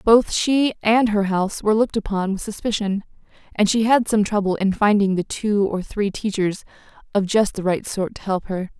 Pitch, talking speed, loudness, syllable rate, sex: 205 Hz, 205 wpm, -20 LUFS, 5.1 syllables/s, female